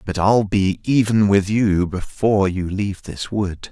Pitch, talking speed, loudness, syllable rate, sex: 100 Hz, 180 wpm, -19 LUFS, 4.2 syllables/s, male